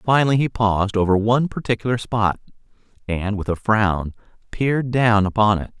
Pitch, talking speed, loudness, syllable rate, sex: 110 Hz, 155 wpm, -20 LUFS, 5.4 syllables/s, male